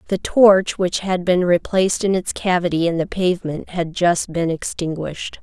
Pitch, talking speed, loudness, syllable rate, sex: 175 Hz, 175 wpm, -19 LUFS, 4.8 syllables/s, female